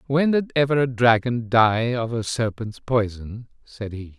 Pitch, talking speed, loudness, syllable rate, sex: 120 Hz, 160 wpm, -21 LUFS, 4.2 syllables/s, male